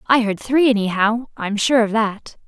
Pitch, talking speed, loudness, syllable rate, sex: 225 Hz, 195 wpm, -18 LUFS, 4.5 syllables/s, female